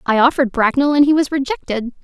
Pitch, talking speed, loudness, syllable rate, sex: 265 Hz, 205 wpm, -16 LUFS, 6.6 syllables/s, female